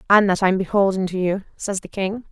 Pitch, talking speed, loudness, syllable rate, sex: 195 Hz, 235 wpm, -20 LUFS, 5.6 syllables/s, female